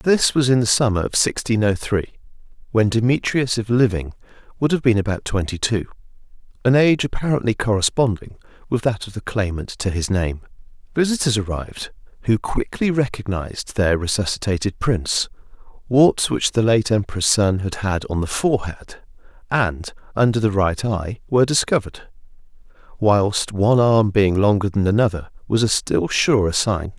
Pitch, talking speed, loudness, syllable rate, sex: 110 Hz, 150 wpm, -19 LUFS, 5.1 syllables/s, male